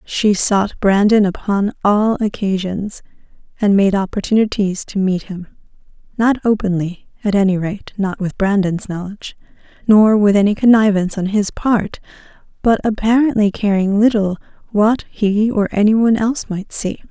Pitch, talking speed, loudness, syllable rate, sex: 205 Hz, 135 wpm, -16 LUFS, 4.8 syllables/s, female